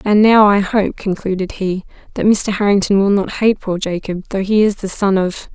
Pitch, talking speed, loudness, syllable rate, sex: 200 Hz, 215 wpm, -15 LUFS, 5.0 syllables/s, female